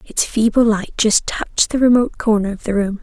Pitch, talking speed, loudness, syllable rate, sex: 220 Hz, 220 wpm, -16 LUFS, 5.6 syllables/s, female